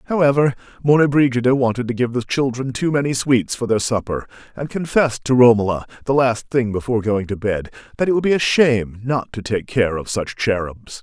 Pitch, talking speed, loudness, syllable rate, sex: 120 Hz, 205 wpm, -19 LUFS, 5.7 syllables/s, male